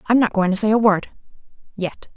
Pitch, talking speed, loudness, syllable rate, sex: 210 Hz, 195 wpm, -18 LUFS, 5.7 syllables/s, female